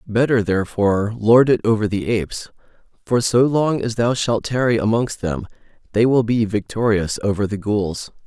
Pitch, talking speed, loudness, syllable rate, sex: 110 Hz, 165 wpm, -19 LUFS, 4.8 syllables/s, male